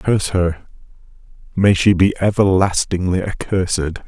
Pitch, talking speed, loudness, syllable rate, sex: 95 Hz, 105 wpm, -17 LUFS, 5.0 syllables/s, male